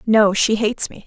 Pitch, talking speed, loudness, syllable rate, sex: 215 Hz, 225 wpm, -17 LUFS, 5.3 syllables/s, female